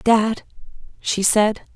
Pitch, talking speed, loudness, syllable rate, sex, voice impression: 215 Hz, 105 wpm, -19 LUFS, 2.9 syllables/s, female, feminine, slightly adult-like, slightly tensed, clear, calm, reassuring, slightly elegant